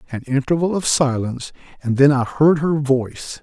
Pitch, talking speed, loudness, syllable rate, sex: 140 Hz, 175 wpm, -18 LUFS, 5.2 syllables/s, male